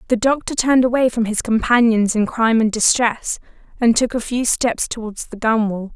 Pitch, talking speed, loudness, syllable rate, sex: 230 Hz, 190 wpm, -17 LUFS, 5.4 syllables/s, female